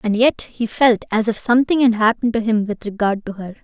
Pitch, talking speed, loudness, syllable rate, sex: 225 Hz, 250 wpm, -18 LUFS, 5.9 syllables/s, female